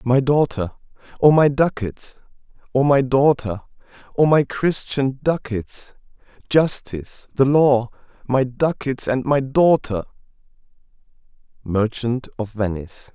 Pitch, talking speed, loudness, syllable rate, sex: 130 Hz, 85 wpm, -19 LUFS, 4.0 syllables/s, male